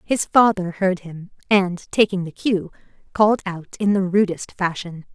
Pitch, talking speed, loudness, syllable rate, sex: 190 Hz, 165 wpm, -20 LUFS, 4.5 syllables/s, female